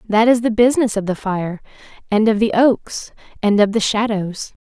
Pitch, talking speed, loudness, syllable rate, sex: 215 Hz, 195 wpm, -17 LUFS, 4.9 syllables/s, female